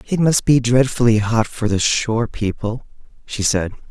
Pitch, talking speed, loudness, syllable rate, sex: 115 Hz, 170 wpm, -18 LUFS, 4.7 syllables/s, male